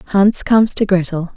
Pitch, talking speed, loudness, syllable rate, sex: 195 Hz, 175 wpm, -15 LUFS, 4.7 syllables/s, female